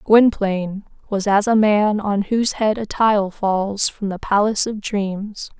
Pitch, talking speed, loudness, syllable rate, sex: 205 Hz, 170 wpm, -19 LUFS, 4.1 syllables/s, female